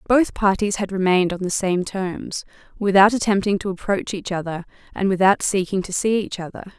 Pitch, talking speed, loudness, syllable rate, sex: 195 Hz, 185 wpm, -20 LUFS, 5.4 syllables/s, female